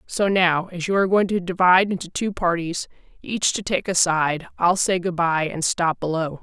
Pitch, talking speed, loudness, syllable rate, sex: 175 Hz, 215 wpm, -21 LUFS, 5.0 syllables/s, female